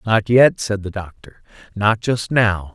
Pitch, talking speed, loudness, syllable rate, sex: 105 Hz, 175 wpm, -17 LUFS, 3.9 syllables/s, male